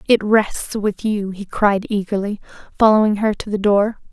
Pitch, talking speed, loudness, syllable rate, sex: 205 Hz, 175 wpm, -18 LUFS, 4.6 syllables/s, female